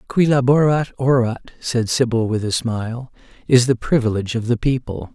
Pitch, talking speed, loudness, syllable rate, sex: 120 Hz, 165 wpm, -18 LUFS, 5.2 syllables/s, male